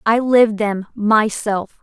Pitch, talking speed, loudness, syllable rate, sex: 215 Hz, 130 wpm, -17 LUFS, 3.7 syllables/s, female